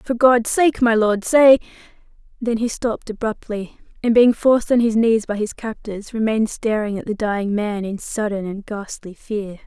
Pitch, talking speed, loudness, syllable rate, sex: 220 Hz, 185 wpm, -19 LUFS, 4.8 syllables/s, female